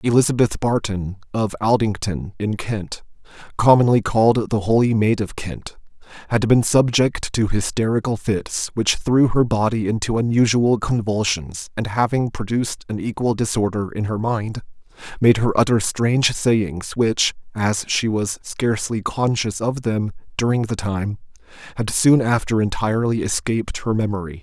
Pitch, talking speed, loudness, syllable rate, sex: 110 Hz, 140 wpm, -20 LUFS, 4.6 syllables/s, male